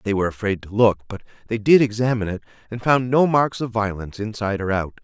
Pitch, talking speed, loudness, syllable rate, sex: 110 Hz, 225 wpm, -20 LUFS, 6.6 syllables/s, male